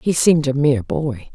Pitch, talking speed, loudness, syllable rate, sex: 150 Hz, 225 wpm, -18 LUFS, 5.4 syllables/s, female